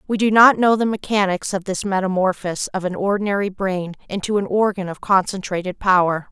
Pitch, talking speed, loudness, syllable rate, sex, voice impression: 195 Hz, 180 wpm, -19 LUFS, 5.7 syllables/s, female, feminine, middle-aged, slightly clear, slightly calm, unique